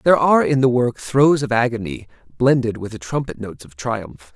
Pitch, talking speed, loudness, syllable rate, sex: 120 Hz, 205 wpm, -19 LUFS, 5.5 syllables/s, male